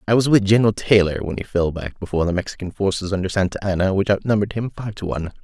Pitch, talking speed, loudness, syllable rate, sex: 100 Hz, 245 wpm, -20 LUFS, 7.2 syllables/s, male